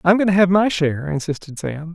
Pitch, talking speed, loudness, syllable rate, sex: 165 Hz, 245 wpm, -19 LUFS, 6.0 syllables/s, male